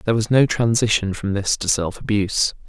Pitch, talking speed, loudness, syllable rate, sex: 105 Hz, 200 wpm, -19 LUFS, 5.7 syllables/s, male